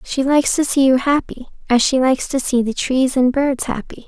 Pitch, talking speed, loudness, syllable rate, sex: 265 Hz, 235 wpm, -17 LUFS, 5.4 syllables/s, female